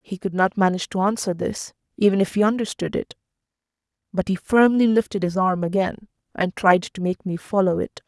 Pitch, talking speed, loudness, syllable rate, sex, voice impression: 195 Hz, 195 wpm, -21 LUFS, 5.6 syllables/s, female, very feminine, slightly young, slightly adult-like, very thin, slightly tensed, slightly weak, slightly dark, slightly hard, very clear, very fluent, slightly raspy, cute, intellectual, very refreshing, slightly sincere, slightly calm, friendly, reassuring, unique, slightly elegant, sweet, lively, strict, slightly intense, sharp, light